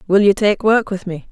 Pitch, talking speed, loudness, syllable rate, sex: 200 Hz, 275 wpm, -16 LUFS, 5.2 syllables/s, female